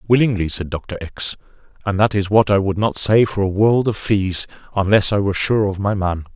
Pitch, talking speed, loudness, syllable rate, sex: 100 Hz, 225 wpm, -18 LUFS, 5.3 syllables/s, male